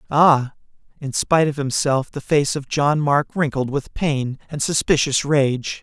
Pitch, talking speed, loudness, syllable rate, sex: 140 Hz, 165 wpm, -19 LUFS, 4.2 syllables/s, male